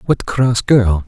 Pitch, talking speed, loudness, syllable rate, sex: 110 Hz, 170 wpm, -14 LUFS, 3.3 syllables/s, male